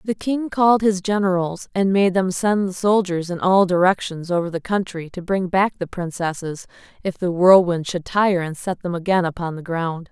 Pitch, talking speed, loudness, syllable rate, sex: 185 Hz, 200 wpm, -20 LUFS, 4.9 syllables/s, female